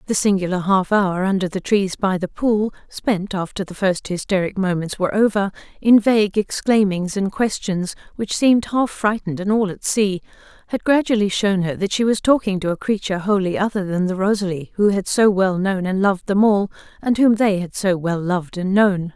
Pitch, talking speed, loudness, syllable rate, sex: 195 Hz, 205 wpm, -19 LUFS, 5.3 syllables/s, female